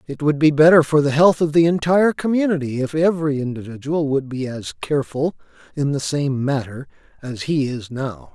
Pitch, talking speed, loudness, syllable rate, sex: 145 Hz, 185 wpm, -19 LUFS, 5.4 syllables/s, male